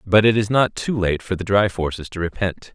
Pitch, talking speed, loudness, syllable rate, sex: 100 Hz, 260 wpm, -20 LUFS, 5.3 syllables/s, male